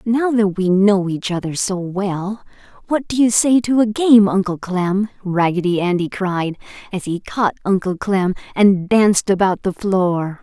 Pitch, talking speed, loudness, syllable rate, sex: 195 Hz, 175 wpm, -17 LUFS, 4.2 syllables/s, female